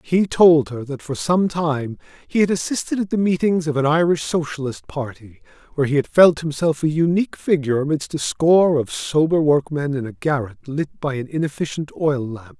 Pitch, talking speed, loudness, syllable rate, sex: 150 Hz, 195 wpm, -19 LUFS, 5.3 syllables/s, male